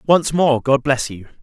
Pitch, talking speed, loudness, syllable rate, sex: 135 Hz, 210 wpm, -17 LUFS, 4.4 syllables/s, male